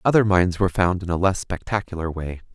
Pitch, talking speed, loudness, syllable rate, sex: 90 Hz, 210 wpm, -22 LUFS, 6.4 syllables/s, male